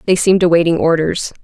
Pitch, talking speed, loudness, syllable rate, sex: 170 Hz, 165 wpm, -13 LUFS, 6.6 syllables/s, female